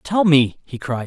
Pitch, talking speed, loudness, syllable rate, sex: 145 Hz, 225 wpm, -17 LUFS, 3.8 syllables/s, male